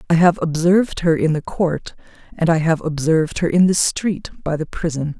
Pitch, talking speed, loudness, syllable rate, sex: 165 Hz, 210 wpm, -18 LUFS, 5.2 syllables/s, female